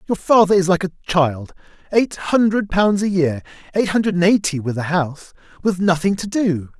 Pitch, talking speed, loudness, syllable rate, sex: 180 Hz, 175 wpm, -18 LUFS, 5.2 syllables/s, male